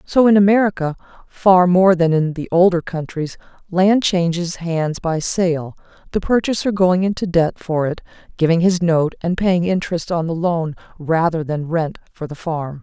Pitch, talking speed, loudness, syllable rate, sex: 170 Hz, 175 wpm, -18 LUFS, 4.6 syllables/s, female